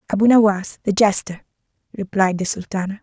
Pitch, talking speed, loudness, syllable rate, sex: 200 Hz, 140 wpm, -18 LUFS, 5.8 syllables/s, female